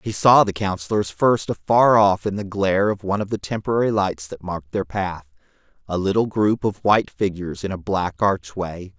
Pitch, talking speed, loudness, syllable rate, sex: 100 Hz, 200 wpm, -21 LUFS, 5.3 syllables/s, male